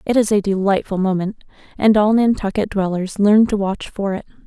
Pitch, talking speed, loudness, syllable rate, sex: 200 Hz, 190 wpm, -17 LUFS, 5.2 syllables/s, female